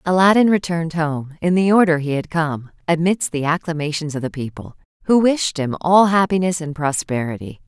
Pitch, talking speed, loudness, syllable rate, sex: 165 Hz, 170 wpm, -18 LUFS, 5.3 syllables/s, female